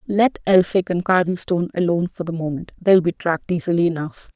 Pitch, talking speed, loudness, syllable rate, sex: 175 Hz, 165 wpm, -20 LUFS, 5.9 syllables/s, female